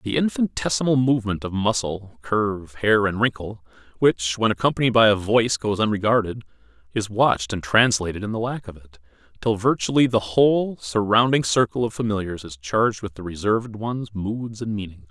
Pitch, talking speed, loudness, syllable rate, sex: 110 Hz, 170 wpm, -22 LUFS, 5.6 syllables/s, male